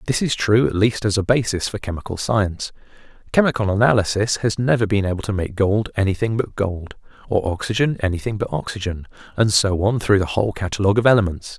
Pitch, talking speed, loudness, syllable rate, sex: 105 Hz, 190 wpm, -20 LUFS, 6.1 syllables/s, male